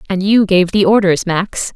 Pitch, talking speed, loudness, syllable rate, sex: 190 Hz, 205 wpm, -13 LUFS, 4.5 syllables/s, female